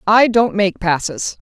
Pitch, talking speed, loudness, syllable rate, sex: 200 Hz, 165 wpm, -16 LUFS, 3.9 syllables/s, female